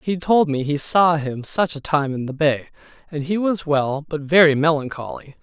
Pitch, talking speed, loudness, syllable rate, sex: 155 Hz, 210 wpm, -19 LUFS, 4.8 syllables/s, male